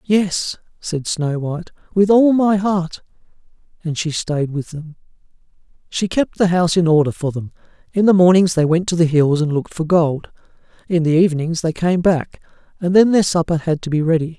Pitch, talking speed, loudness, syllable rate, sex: 170 Hz, 195 wpm, -17 LUFS, 5.2 syllables/s, male